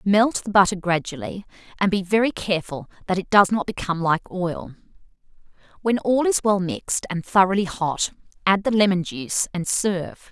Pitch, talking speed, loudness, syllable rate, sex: 190 Hz, 170 wpm, -22 LUFS, 5.3 syllables/s, female